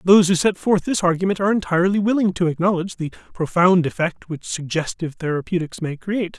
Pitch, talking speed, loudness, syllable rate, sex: 180 Hz, 180 wpm, -20 LUFS, 6.4 syllables/s, male